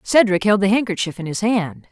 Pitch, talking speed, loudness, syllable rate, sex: 200 Hz, 220 wpm, -18 LUFS, 5.6 syllables/s, female